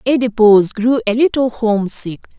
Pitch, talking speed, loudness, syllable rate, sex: 235 Hz, 150 wpm, -14 LUFS, 4.7 syllables/s, female